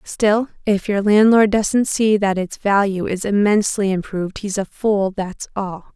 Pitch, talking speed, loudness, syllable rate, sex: 200 Hz, 170 wpm, -18 LUFS, 4.4 syllables/s, female